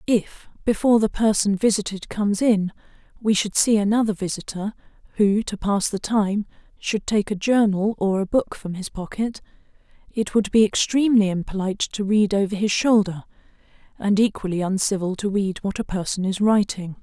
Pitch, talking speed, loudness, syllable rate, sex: 205 Hz, 165 wpm, -22 LUFS, 5.2 syllables/s, female